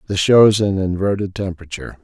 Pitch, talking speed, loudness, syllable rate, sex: 95 Hz, 145 wpm, -16 LUFS, 6.0 syllables/s, male